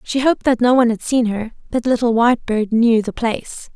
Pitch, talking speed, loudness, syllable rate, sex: 235 Hz, 225 wpm, -17 LUFS, 5.8 syllables/s, female